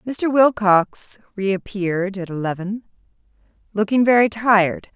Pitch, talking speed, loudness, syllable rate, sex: 205 Hz, 95 wpm, -19 LUFS, 4.2 syllables/s, female